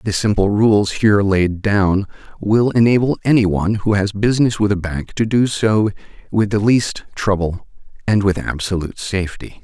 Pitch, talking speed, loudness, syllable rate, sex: 100 Hz, 160 wpm, -17 LUFS, 4.8 syllables/s, male